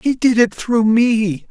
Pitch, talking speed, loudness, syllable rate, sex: 225 Hz, 200 wpm, -15 LUFS, 3.5 syllables/s, male